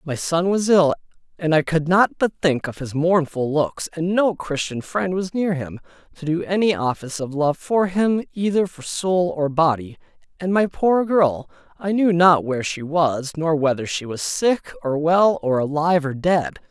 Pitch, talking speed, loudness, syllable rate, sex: 165 Hz, 200 wpm, -20 LUFS, 4.5 syllables/s, male